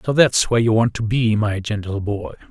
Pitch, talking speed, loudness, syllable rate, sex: 110 Hz, 240 wpm, -19 LUFS, 5.4 syllables/s, male